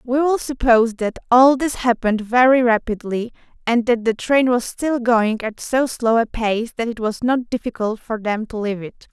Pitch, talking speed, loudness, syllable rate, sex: 235 Hz, 205 wpm, -19 LUFS, 4.9 syllables/s, female